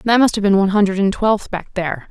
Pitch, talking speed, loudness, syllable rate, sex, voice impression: 200 Hz, 285 wpm, -17 LUFS, 6.6 syllables/s, female, very feminine, adult-like, slightly middle-aged, very thin, slightly tensed, slightly weak, bright, hard, clear, fluent, slightly raspy, cute, intellectual, refreshing, very sincere, very calm, very friendly, very reassuring, slightly unique, very elegant, sweet, slightly lively, kind, slightly sharp